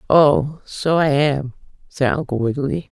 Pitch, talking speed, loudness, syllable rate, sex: 145 Hz, 140 wpm, -19 LUFS, 4.3 syllables/s, female